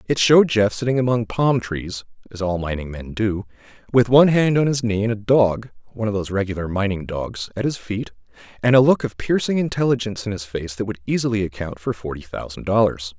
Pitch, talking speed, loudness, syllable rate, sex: 110 Hz, 215 wpm, -20 LUFS, 6.0 syllables/s, male